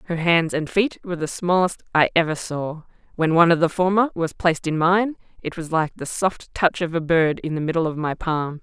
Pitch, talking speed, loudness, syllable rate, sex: 165 Hz, 235 wpm, -21 LUFS, 5.3 syllables/s, female